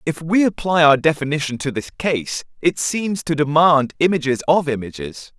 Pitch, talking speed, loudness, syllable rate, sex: 150 Hz, 165 wpm, -18 LUFS, 4.8 syllables/s, male